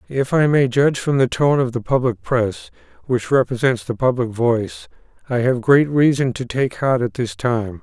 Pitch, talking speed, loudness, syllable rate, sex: 125 Hz, 200 wpm, -18 LUFS, 4.8 syllables/s, male